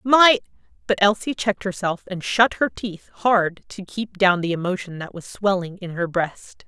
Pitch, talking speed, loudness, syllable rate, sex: 195 Hz, 180 wpm, -21 LUFS, 4.6 syllables/s, female